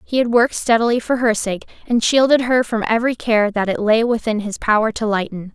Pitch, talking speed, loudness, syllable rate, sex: 225 Hz, 225 wpm, -17 LUFS, 5.8 syllables/s, female